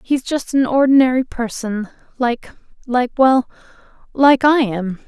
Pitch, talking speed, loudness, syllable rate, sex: 250 Hz, 95 wpm, -16 LUFS, 4.2 syllables/s, female